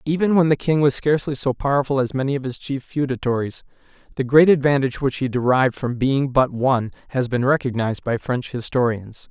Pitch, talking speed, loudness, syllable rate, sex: 130 Hz, 195 wpm, -20 LUFS, 6.0 syllables/s, male